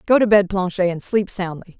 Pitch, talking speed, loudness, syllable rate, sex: 190 Hz, 235 wpm, -19 LUFS, 5.4 syllables/s, female